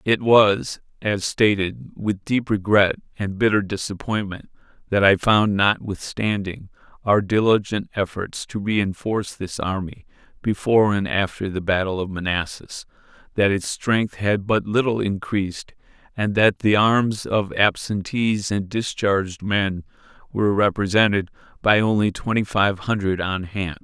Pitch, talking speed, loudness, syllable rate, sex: 100 Hz, 135 wpm, -21 LUFS, 4.3 syllables/s, male